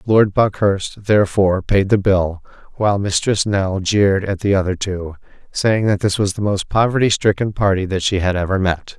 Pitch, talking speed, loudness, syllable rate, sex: 100 Hz, 185 wpm, -17 LUFS, 5.0 syllables/s, male